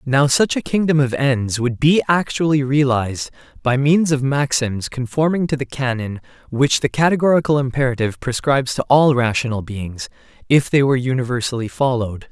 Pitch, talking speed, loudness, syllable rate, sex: 135 Hz, 155 wpm, -18 LUFS, 5.4 syllables/s, male